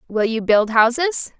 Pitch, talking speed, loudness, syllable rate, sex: 240 Hz, 170 wpm, -17 LUFS, 4.2 syllables/s, female